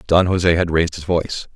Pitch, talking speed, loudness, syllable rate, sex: 85 Hz, 230 wpm, -18 LUFS, 5.8 syllables/s, male